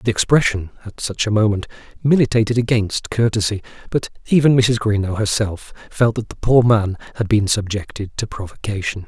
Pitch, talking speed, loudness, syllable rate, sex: 110 Hz, 160 wpm, -18 LUFS, 5.3 syllables/s, male